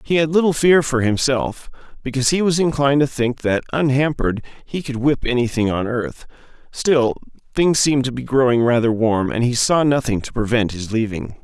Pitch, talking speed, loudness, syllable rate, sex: 130 Hz, 190 wpm, -18 LUFS, 5.5 syllables/s, male